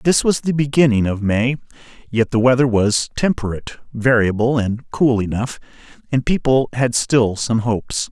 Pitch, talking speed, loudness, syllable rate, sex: 120 Hz, 155 wpm, -18 LUFS, 4.8 syllables/s, male